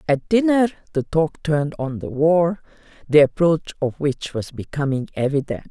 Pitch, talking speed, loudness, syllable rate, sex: 150 Hz, 160 wpm, -20 LUFS, 4.7 syllables/s, female